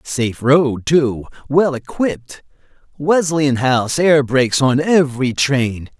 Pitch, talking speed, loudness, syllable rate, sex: 135 Hz, 110 wpm, -16 LUFS, 4.0 syllables/s, male